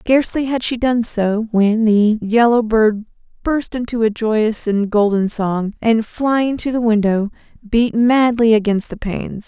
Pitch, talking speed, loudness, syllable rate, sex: 225 Hz, 165 wpm, -16 LUFS, 4.1 syllables/s, female